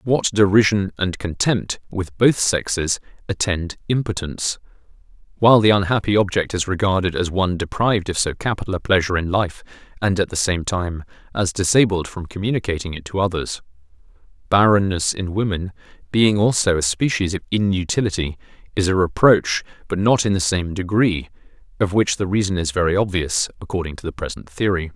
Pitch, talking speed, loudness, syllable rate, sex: 95 Hz, 160 wpm, -20 LUFS, 5.6 syllables/s, male